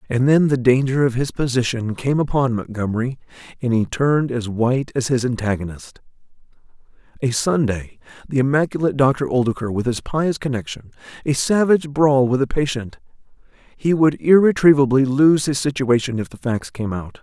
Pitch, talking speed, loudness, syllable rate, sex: 130 Hz, 155 wpm, -19 LUFS, 5.4 syllables/s, male